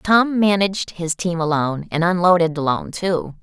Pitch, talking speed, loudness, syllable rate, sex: 175 Hz, 160 wpm, -19 LUFS, 5.1 syllables/s, female